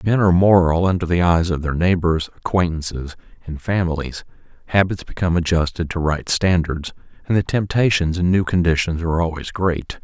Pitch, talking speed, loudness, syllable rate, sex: 85 Hz, 160 wpm, -19 LUFS, 5.5 syllables/s, male